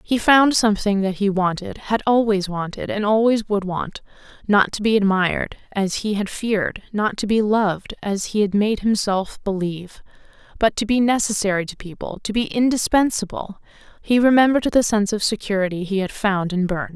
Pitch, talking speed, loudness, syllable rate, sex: 205 Hz, 175 wpm, -20 LUFS, 5.3 syllables/s, female